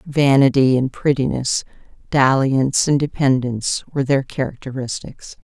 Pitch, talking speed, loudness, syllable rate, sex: 135 Hz, 100 wpm, -18 LUFS, 4.9 syllables/s, female